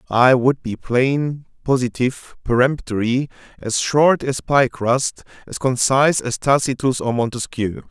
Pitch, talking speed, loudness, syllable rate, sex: 130 Hz, 115 wpm, -18 LUFS, 4.2 syllables/s, male